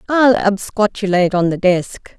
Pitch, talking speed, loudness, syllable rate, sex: 200 Hz, 135 wpm, -15 LUFS, 4.6 syllables/s, female